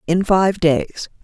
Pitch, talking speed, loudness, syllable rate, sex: 175 Hz, 145 wpm, -17 LUFS, 3.1 syllables/s, female